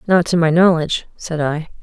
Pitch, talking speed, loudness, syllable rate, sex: 165 Hz, 195 wpm, -17 LUFS, 5.4 syllables/s, female